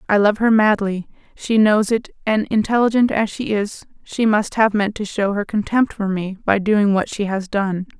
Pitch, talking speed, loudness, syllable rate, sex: 210 Hz, 210 wpm, -18 LUFS, 4.6 syllables/s, female